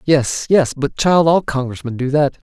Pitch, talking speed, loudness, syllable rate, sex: 145 Hz, 190 wpm, -16 LUFS, 4.4 syllables/s, male